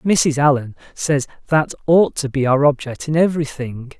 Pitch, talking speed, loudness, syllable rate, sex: 145 Hz, 165 wpm, -18 LUFS, 4.7 syllables/s, male